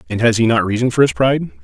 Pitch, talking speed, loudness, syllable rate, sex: 115 Hz, 295 wpm, -15 LUFS, 7.5 syllables/s, male